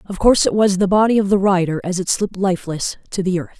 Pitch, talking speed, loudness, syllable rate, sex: 190 Hz, 265 wpm, -17 LUFS, 6.6 syllables/s, female